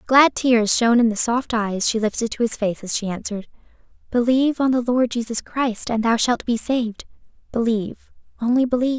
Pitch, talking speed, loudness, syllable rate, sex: 235 Hz, 195 wpm, -20 LUFS, 5.6 syllables/s, female